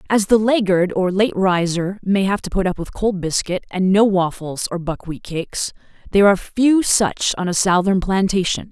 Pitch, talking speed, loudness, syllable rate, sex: 190 Hz, 195 wpm, -18 LUFS, 4.9 syllables/s, female